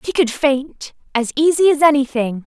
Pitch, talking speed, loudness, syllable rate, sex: 275 Hz, 165 wpm, -16 LUFS, 4.7 syllables/s, female